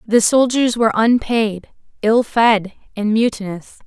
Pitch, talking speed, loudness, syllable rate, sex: 220 Hz, 125 wpm, -16 LUFS, 4.0 syllables/s, female